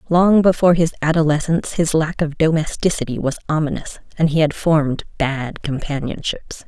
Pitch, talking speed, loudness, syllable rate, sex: 155 Hz, 145 wpm, -18 LUFS, 5.3 syllables/s, female